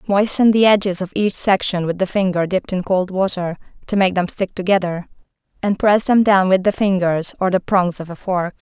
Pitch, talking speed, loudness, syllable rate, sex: 190 Hz, 215 wpm, -18 LUFS, 5.3 syllables/s, female